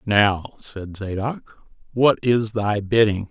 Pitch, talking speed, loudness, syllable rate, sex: 105 Hz, 125 wpm, -21 LUFS, 3.2 syllables/s, male